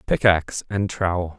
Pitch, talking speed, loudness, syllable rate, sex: 90 Hz, 130 wpm, -22 LUFS, 5.1 syllables/s, male